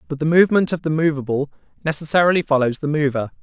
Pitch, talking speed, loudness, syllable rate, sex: 150 Hz, 175 wpm, -19 LUFS, 7.1 syllables/s, male